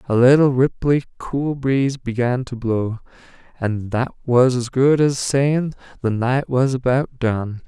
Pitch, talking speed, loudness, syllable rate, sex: 125 Hz, 155 wpm, -19 LUFS, 4.0 syllables/s, male